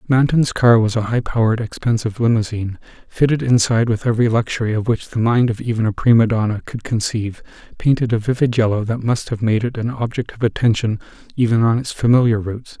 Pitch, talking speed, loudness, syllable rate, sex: 115 Hz, 195 wpm, -18 LUFS, 6.3 syllables/s, male